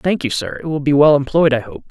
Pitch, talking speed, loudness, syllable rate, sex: 145 Hz, 315 wpm, -16 LUFS, 6.0 syllables/s, male